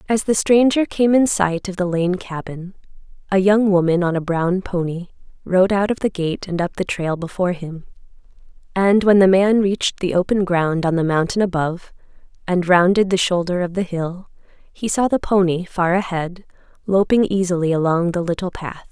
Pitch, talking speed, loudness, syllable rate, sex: 185 Hz, 185 wpm, -18 LUFS, 5.0 syllables/s, female